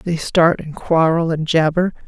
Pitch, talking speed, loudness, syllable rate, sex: 165 Hz, 175 wpm, -17 LUFS, 4.2 syllables/s, female